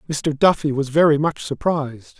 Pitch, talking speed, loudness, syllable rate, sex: 145 Hz, 165 wpm, -19 LUFS, 5.1 syllables/s, male